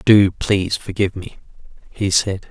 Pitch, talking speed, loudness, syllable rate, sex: 100 Hz, 145 wpm, -18 LUFS, 4.6 syllables/s, male